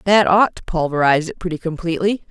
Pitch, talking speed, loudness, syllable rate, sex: 175 Hz, 180 wpm, -18 LUFS, 6.7 syllables/s, female